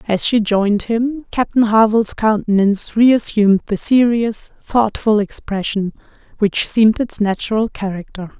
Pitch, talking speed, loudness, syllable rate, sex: 215 Hz, 130 wpm, -16 LUFS, 4.8 syllables/s, female